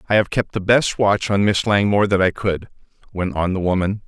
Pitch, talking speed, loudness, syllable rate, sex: 100 Hz, 235 wpm, -19 LUFS, 5.6 syllables/s, male